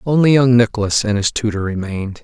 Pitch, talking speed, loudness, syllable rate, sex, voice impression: 115 Hz, 190 wpm, -16 LUFS, 6.2 syllables/s, male, masculine, adult-like, thick, slightly relaxed, soft, slightly muffled, cool, calm, mature, wild, kind, modest